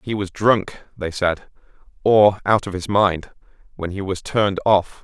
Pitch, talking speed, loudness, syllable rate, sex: 100 Hz, 180 wpm, -19 LUFS, 4.2 syllables/s, male